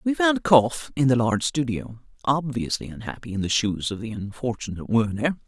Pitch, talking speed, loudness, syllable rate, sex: 125 Hz, 175 wpm, -24 LUFS, 5.4 syllables/s, female